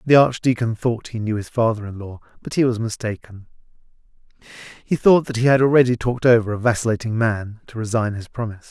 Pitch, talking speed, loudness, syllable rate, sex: 115 Hz, 195 wpm, -20 LUFS, 6.2 syllables/s, male